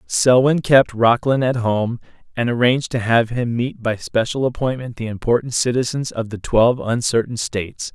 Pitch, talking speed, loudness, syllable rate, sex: 120 Hz, 165 wpm, -18 LUFS, 5.0 syllables/s, male